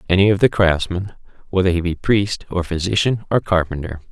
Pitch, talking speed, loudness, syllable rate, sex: 95 Hz, 175 wpm, -18 LUFS, 5.6 syllables/s, male